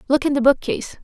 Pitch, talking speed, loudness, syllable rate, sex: 275 Hz, 230 wpm, -18 LUFS, 7.3 syllables/s, female